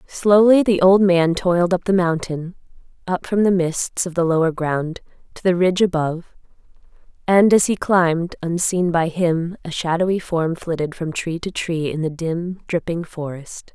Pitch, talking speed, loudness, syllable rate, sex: 175 Hz, 175 wpm, -19 LUFS, 4.6 syllables/s, female